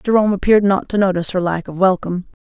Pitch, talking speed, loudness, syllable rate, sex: 190 Hz, 220 wpm, -17 LUFS, 7.7 syllables/s, female